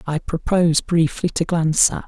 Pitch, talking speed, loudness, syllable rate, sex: 165 Hz, 175 wpm, -19 LUFS, 5.2 syllables/s, male